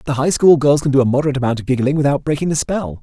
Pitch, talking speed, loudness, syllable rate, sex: 140 Hz, 280 wpm, -16 LUFS, 7.6 syllables/s, male